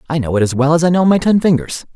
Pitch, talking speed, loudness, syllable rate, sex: 155 Hz, 340 wpm, -14 LUFS, 7.0 syllables/s, male